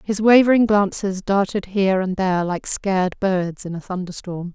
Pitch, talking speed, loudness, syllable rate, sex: 190 Hz, 170 wpm, -20 LUFS, 4.9 syllables/s, female